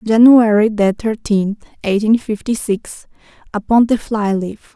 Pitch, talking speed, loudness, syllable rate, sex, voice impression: 215 Hz, 115 wpm, -15 LUFS, 4.1 syllables/s, female, feminine, adult-like, slightly soft, slightly fluent, slightly refreshing, sincere, kind